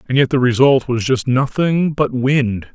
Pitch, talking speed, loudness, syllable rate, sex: 130 Hz, 195 wpm, -16 LUFS, 4.3 syllables/s, male